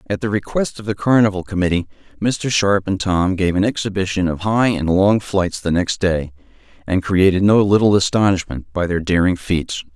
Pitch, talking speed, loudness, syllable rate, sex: 95 Hz, 185 wpm, -18 LUFS, 5.1 syllables/s, male